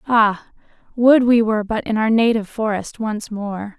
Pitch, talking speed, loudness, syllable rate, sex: 220 Hz, 175 wpm, -18 LUFS, 4.8 syllables/s, female